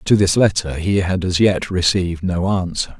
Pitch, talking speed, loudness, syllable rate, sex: 90 Hz, 200 wpm, -18 LUFS, 4.8 syllables/s, male